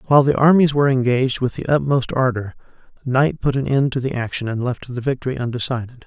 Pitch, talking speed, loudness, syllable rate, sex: 130 Hz, 210 wpm, -19 LUFS, 6.3 syllables/s, male